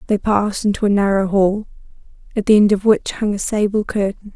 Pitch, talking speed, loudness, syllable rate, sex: 205 Hz, 205 wpm, -17 LUFS, 5.7 syllables/s, female